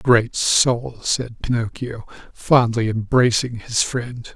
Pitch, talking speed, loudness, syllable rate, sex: 120 Hz, 110 wpm, -19 LUFS, 3.3 syllables/s, male